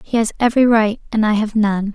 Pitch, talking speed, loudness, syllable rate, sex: 220 Hz, 245 wpm, -16 LUFS, 6.0 syllables/s, female